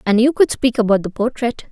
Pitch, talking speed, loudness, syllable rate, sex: 230 Hz, 245 wpm, -17 LUFS, 5.7 syllables/s, female